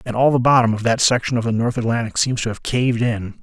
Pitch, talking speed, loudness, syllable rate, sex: 120 Hz, 280 wpm, -18 LUFS, 6.4 syllables/s, male